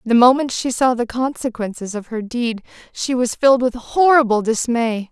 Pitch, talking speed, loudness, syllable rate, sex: 240 Hz, 175 wpm, -18 LUFS, 4.9 syllables/s, female